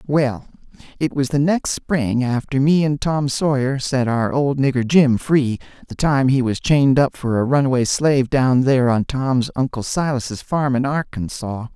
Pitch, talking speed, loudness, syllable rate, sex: 135 Hz, 185 wpm, -18 LUFS, 4.5 syllables/s, male